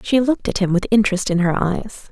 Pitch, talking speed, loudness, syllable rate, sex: 200 Hz, 255 wpm, -18 LUFS, 6.1 syllables/s, female